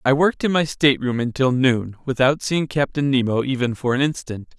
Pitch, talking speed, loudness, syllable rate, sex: 135 Hz, 195 wpm, -20 LUFS, 5.5 syllables/s, male